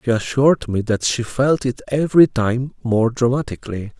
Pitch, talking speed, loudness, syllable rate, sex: 125 Hz, 165 wpm, -18 LUFS, 5.2 syllables/s, male